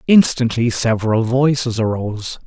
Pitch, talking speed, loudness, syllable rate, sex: 120 Hz, 95 wpm, -17 LUFS, 4.9 syllables/s, male